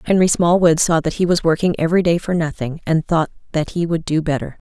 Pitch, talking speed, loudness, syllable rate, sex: 165 Hz, 230 wpm, -18 LUFS, 6.1 syllables/s, female